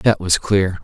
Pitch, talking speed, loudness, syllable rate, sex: 95 Hz, 215 wpm, -17 LUFS, 4.0 syllables/s, male